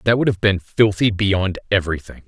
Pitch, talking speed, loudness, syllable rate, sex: 100 Hz, 185 wpm, -19 LUFS, 5.5 syllables/s, male